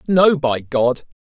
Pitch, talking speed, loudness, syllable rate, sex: 145 Hz, 145 wpm, -17 LUFS, 3.2 syllables/s, male